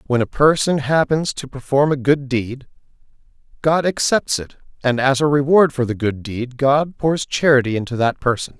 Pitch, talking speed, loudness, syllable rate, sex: 135 Hz, 180 wpm, -18 LUFS, 4.9 syllables/s, male